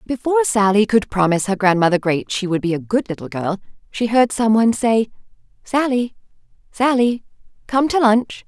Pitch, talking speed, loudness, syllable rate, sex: 220 Hz, 170 wpm, -18 LUFS, 5.4 syllables/s, female